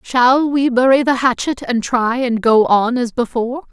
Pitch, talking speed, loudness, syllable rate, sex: 245 Hz, 195 wpm, -15 LUFS, 4.4 syllables/s, female